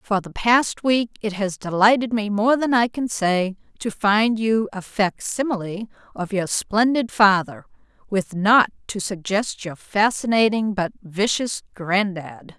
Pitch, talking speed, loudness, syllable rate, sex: 210 Hz, 155 wpm, -21 LUFS, 3.9 syllables/s, female